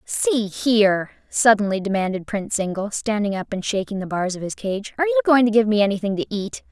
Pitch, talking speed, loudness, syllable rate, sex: 210 Hz, 215 wpm, -21 LUFS, 5.8 syllables/s, female